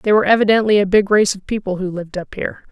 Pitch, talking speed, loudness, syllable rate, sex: 200 Hz, 265 wpm, -16 LUFS, 7.2 syllables/s, female